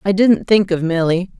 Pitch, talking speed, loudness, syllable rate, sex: 185 Hz, 215 wpm, -15 LUFS, 4.8 syllables/s, female